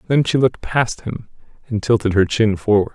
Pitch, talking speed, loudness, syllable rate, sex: 115 Hz, 205 wpm, -18 LUFS, 5.5 syllables/s, male